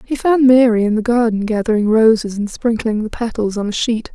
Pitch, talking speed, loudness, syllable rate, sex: 225 Hz, 215 wpm, -15 LUFS, 5.5 syllables/s, female